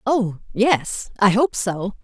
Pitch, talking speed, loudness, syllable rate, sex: 215 Hz, 150 wpm, -20 LUFS, 3.1 syllables/s, female